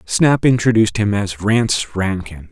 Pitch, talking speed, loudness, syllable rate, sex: 105 Hz, 145 wpm, -16 LUFS, 4.6 syllables/s, male